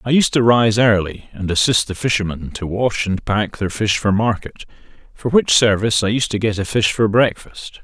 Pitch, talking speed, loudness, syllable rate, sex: 110 Hz, 215 wpm, -17 LUFS, 5.1 syllables/s, male